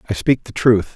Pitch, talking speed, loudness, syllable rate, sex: 110 Hz, 255 wpm, -17 LUFS, 5.5 syllables/s, male